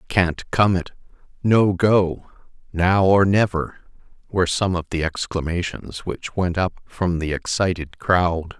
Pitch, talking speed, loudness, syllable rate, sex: 90 Hz, 140 wpm, -21 LUFS, 3.8 syllables/s, male